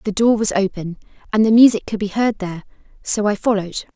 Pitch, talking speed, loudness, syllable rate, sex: 210 Hz, 210 wpm, -17 LUFS, 6.5 syllables/s, female